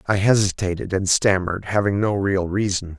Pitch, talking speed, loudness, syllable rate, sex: 100 Hz, 160 wpm, -20 LUFS, 5.3 syllables/s, male